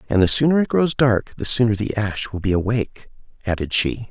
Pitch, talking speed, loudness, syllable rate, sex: 110 Hz, 220 wpm, -19 LUFS, 5.7 syllables/s, male